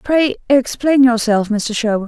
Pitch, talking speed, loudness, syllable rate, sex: 245 Hz, 145 wpm, -15 LUFS, 4.3 syllables/s, female